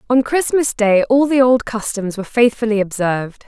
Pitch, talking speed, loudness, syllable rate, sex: 230 Hz, 175 wpm, -16 LUFS, 5.2 syllables/s, female